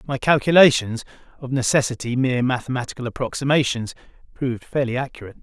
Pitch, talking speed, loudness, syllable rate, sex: 130 Hz, 90 wpm, -20 LUFS, 6.6 syllables/s, male